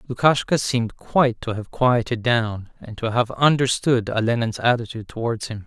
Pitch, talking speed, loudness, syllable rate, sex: 120 Hz, 160 wpm, -21 LUFS, 5.1 syllables/s, male